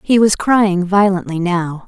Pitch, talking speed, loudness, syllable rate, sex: 190 Hz, 160 wpm, -15 LUFS, 4.0 syllables/s, female